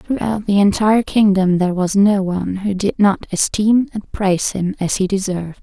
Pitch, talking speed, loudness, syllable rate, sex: 195 Hz, 190 wpm, -17 LUFS, 5.2 syllables/s, female